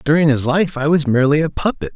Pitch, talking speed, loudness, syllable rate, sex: 150 Hz, 245 wpm, -16 LUFS, 6.5 syllables/s, male